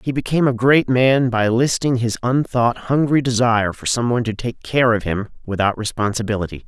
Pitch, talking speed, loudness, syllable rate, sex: 120 Hz, 180 wpm, -18 LUFS, 5.5 syllables/s, male